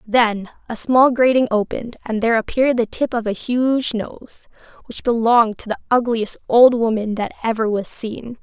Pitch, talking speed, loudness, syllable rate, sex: 230 Hz, 180 wpm, -18 LUFS, 5.0 syllables/s, female